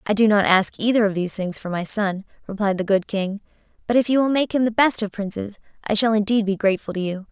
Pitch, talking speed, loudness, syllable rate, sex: 210 Hz, 265 wpm, -21 LUFS, 6.2 syllables/s, female